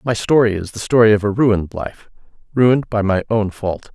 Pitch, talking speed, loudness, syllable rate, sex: 105 Hz, 200 wpm, -17 LUFS, 5.4 syllables/s, male